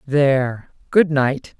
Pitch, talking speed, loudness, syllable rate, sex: 140 Hz, 115 wpm, -18 LUFS, 3.1 syllables/s, female